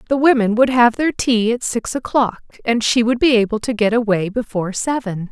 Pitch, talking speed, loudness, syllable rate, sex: 230 Hz, 215 wpm, -17 LUFS, 5.3 syllables/s, female